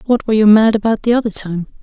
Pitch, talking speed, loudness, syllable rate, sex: 215 Hz, 265 wpm, -14 LUFS, 6.8 syllables/s, female